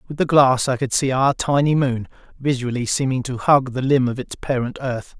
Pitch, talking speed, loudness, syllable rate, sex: 130 Hz, 220 wpm, -19 LUFS, 5.1 syllables/s, male